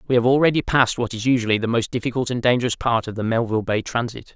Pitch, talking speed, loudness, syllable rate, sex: 120 Hz, 250 wpm, -21 LUFS, 7.2 syllables/s, male